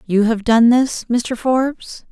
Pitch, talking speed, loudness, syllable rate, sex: 235 Hz, 170 wpm, -16 LUFS, 3.6 syllables/s, female